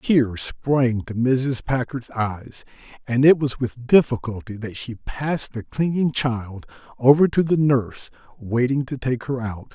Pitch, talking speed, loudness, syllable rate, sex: 125 Hz, 160 wpm, -21 LUFS, 4.1 syllables/s, male